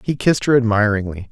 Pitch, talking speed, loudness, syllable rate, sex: 115 Hz, 185 wpm, -17 LUFS, 6.6 syllables/s, male